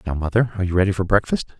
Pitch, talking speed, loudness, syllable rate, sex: 95 Hz, 265 wpm, -20 LUFS, 7.8 syllables/s, male